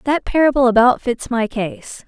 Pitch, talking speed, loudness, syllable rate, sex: 245 Hz, 175 wpm, -16 LUFS, 4.6 syllables/s, female